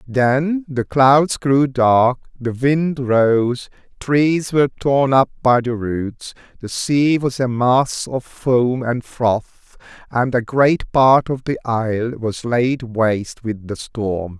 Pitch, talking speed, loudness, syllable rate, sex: 125 Hz, 155 wpm, -18 LUFS, 3.1 syllables/s, male